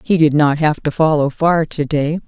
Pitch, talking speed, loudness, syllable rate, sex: 155 Hz, 235 wpm, -15 LUFS, 4.7 syllables/s, female